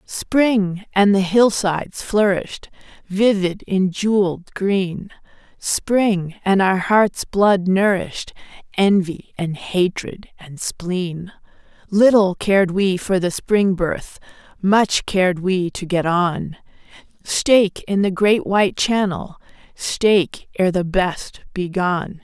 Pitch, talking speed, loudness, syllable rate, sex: 190 Hz, 120 wpm, -18 LUFS, 3.4 syllables/s, female